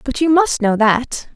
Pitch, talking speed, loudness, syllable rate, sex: 260 Hz, 220 wpm, -15 LUFS, 4.1 syllables/s, female